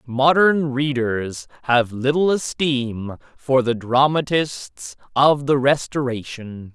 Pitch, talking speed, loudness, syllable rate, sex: 130 Hz, 100 wpm, -19 LUFS, 3.3 syllables/s, male